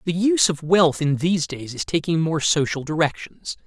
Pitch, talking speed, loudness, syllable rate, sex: 160 Hz, 195 wpm, -21 LUFS, 5.2 syllables/s, male